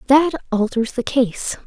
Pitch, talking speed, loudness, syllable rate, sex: 250 Hz, 145 wpm, -19 LUFS, 4.0 syllables/s, female